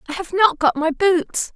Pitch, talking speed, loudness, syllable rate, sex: 345 Hz, 230 wpm, -18 LUFS, 4.4 syllables/s, female